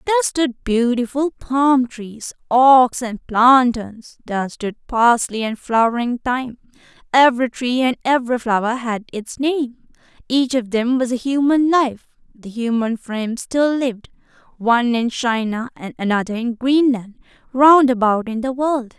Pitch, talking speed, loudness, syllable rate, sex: 245 Hz, 140 wpm, -18 LUFS, 4.6 syllables/s, female